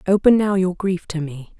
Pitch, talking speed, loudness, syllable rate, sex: 180 Hz, 225 wpm, -19 LUFS, 4.9 syllables/s, female